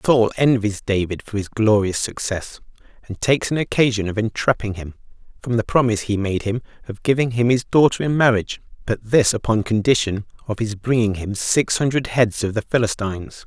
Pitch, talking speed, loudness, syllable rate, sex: 110 Hz, 185 wpm, -20 LUFS, 5.5 syllables/s, male